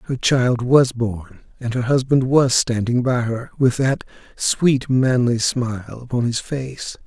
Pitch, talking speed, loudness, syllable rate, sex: 125 Hz, 160 wpm, -19 LUFS, 3.8 syllables/s, male